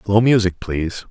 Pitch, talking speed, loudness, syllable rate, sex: 100 Hz, 165 wpm, -18 LUFS, 5.1 syllables/s, male